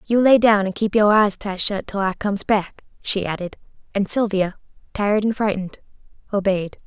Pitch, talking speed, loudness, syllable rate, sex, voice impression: 200 Hz, 185 wpm, -20 LUFS, 5.3 syllables/s, female, feminine, slightly young, tensed, powerful, bright, soft, clear, intellectual, friendly, reassuring, sweet, kind